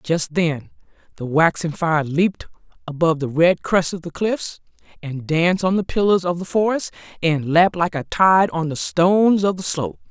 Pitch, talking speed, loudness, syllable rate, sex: 170 Hz, 190 wpm, -19 LUFS, 5.0 syllables/s, female